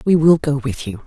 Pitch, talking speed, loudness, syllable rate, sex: 145 Hz, 280 wpm, -16 LUFS, 5.2 syllables/s, female